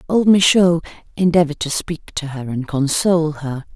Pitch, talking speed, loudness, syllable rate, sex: 160 Hz, 160 wpm, -17 LUFS, 5.1 syllables/s, female